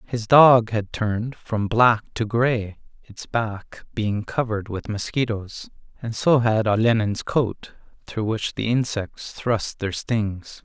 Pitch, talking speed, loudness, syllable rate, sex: 110 Hz, 145 wpm, -22 LUFS, 3.5 syllables/s, male